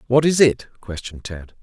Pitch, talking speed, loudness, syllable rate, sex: 115 Hz, 185 wpm, -18 LUFS, 5.4 syllables/s, male